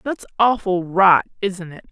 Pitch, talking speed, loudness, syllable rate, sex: 190 Hz, 155 wpm, -18 LUFS, 4.1 syllables/s, female